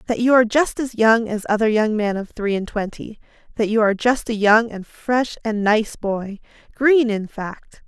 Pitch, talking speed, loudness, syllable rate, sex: 220 Hz, 215 wpm, -19 LUFS, 4.6 syllables/s, female